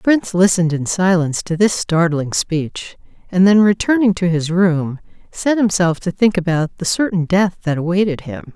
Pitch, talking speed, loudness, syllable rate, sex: 180 Hz, 180 wpm, -16 LUFS, 5.1 syllables/s, female